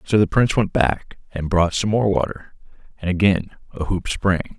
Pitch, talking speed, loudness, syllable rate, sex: 90 Hz, 195 wpm, -20 LUFS, 5.0 syllables/s, male